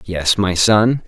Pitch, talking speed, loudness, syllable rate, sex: 100 Hz, 165 wpm, -15 LUFS, 3.1 syllables/s, male